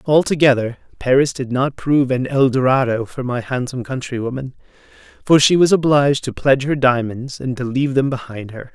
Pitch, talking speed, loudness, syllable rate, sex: 130 Hz, 180 wpm, -17 LUFS, 5.7 syllables/s, male